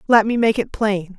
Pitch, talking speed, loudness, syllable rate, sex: 215 Hz, 255 wpm, -18 LUFS, 4.9 syllables/s, female